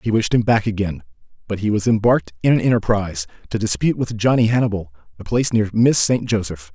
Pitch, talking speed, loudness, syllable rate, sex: 105 Hz, 205 wpm, -19 LUFS, 6.4 syllables/s, male